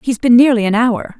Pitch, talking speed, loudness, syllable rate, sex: 235 Hz, 250 wpm, -12 LUFS, 5.5 syllables/s, female